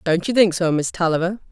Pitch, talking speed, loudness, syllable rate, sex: 175 Hz, 240 wpm, -19 LUFS, 6.0 syllables/s, female